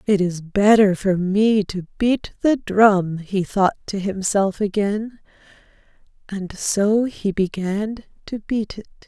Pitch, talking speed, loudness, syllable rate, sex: 200 Hz, 140 wpm, -20 LUFS, 3.6 syllables/s, female